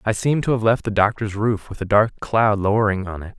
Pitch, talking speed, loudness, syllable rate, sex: 105 Hz, 265 wpm, -20 LUFS, 6.0 syllables/s, male